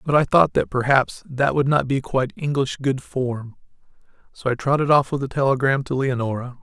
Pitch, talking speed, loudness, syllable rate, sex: 135 Hz, 200 wpm, -21 LUFS, 5.3 syllables/s, male